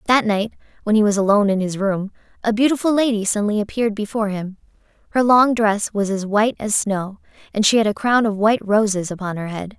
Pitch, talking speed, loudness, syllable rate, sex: 210 Hz, 215 wpm, -19 LUFS, 6.2 syllables/s, female